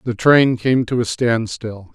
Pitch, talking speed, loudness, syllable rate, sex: 115 Hz, 185 wpm, -17 LUFS, 3.8 syllables/s, male